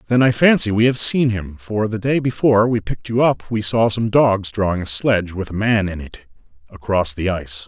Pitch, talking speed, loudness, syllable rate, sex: 105 Hz, 235 wpm, -18 LUFS, 5.4 syllables/s, male